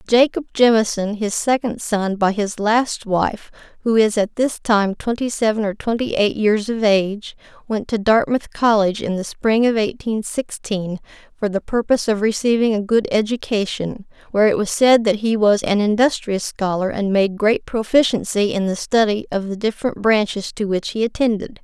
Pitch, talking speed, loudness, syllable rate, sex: 215 Hz, 180 wpm, -19 LUFS, 4.9 syllables/s, female